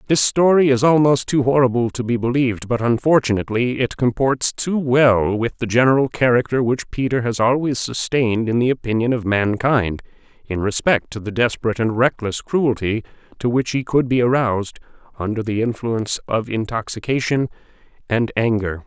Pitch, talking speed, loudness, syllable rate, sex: 120 Hz, 160 wpm, -19 LUFS, 5.3 syllables/s, male